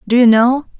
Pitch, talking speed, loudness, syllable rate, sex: 245 Hz, 225 wpm, -12 LUFS, 5.5 syllables/s, female